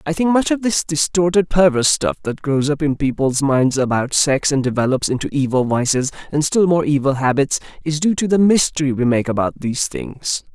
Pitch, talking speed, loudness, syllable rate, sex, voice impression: 145 Hz, 205 wpm, -17 LUFS, 5.4 syllables/s, male, very masculine, very adult-like, tensed, very clear, refreshing, lively